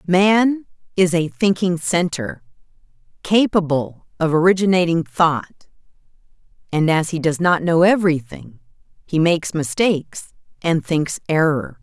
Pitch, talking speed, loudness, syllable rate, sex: 170 Hz, 110 wpm, -18 LUFS, 4.3 syllables/s, female